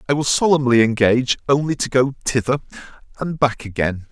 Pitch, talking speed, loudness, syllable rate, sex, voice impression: 130 Hz, 160 wpm, -18 LUFS, 5.8 syllables/s, male, masculine, adult-like, slightly thick, cool, calm, slightly elegant, slightly kind